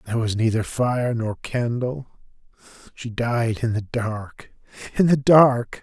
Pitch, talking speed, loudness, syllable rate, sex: 120 Hz, 135 wpm, -21 LUFS, 3.8 syllables/s, male